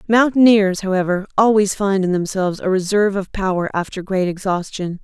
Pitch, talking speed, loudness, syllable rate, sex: 195 Hz, 155 wpm, -17 LUFS, 5.5 syllables/s, female